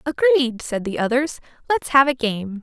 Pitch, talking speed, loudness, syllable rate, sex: 260 Hz, 185 wpm, -20 LUFS, 4.5 syllables/s, female